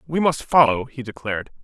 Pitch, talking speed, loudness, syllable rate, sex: 135 Hz, 185 wpm, -20 LUFS, 5.7 syllables/s, male